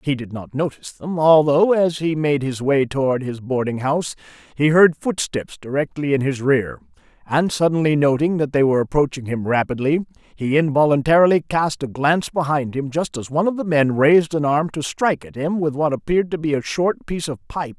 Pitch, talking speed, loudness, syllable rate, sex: 145 Hz, 205 wpm, -19 LUFS, 5.5 syllables/s, male